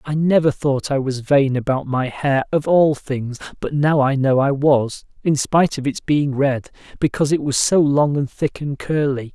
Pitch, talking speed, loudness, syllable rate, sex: 140 Hz, 210 wpm, -19 LUFS, 4.6 syllables/s, male